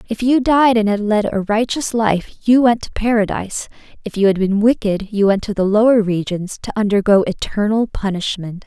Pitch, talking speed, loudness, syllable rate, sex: 210 Hz, 195 wpm, -16 LUFS, 5.2 syllables/s, female